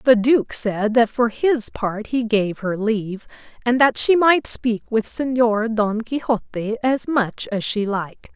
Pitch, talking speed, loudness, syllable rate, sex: 230 Hz, 180 wpm, -20 LUFS, 4.0 syllables/s, female